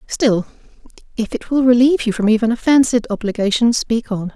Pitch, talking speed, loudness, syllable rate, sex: 230 Hz, 180 wpm, -16 LUFS, 5.8 syllables/s, female